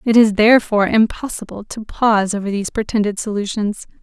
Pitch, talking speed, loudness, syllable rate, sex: 210 Hz, 150 wpm, -17 LUFS, 6.1 syllables/s, female